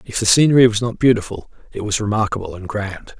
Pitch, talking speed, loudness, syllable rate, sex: 110 Hz, 205 wpm, -17 LUFS, 6.3 syllables/s, male